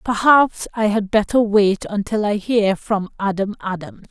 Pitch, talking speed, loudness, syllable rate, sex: 205 Hz, 160 wpm, -18 LUFS, 4.3 syllables/s, female